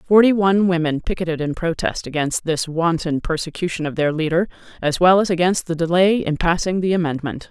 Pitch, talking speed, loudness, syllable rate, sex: 170 Hz, 185 wpm, -19 LUFS, 5.8 syllables/s, female